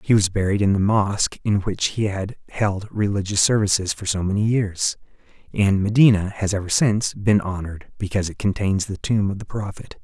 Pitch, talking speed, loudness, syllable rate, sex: 100 Hz, 190 wpm, -21 LUFS, 5.3 syllables/s, male